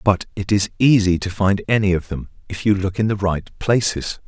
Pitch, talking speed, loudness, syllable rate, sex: 100 Hz, 225 wpm, -19 LUFS, 5.1 syllables/s, male